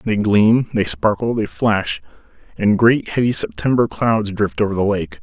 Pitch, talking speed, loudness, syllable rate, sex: 105 Hz, 170 wpm, -17 LUFS, 4.4 syllables/s, male